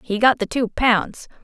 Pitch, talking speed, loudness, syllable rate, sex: 230 Hz, 210 wpm, -19 LUFS, 4.1 syllables/s, female